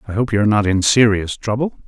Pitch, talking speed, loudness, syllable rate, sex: 110 Hz, 255 wpm, -16 LUFS, 6.6 syllables/s, male